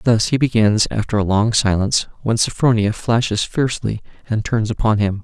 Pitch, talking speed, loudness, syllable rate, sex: 110 Hz, 170 wpm, -18 LUFS, 5.3 syllables/s, male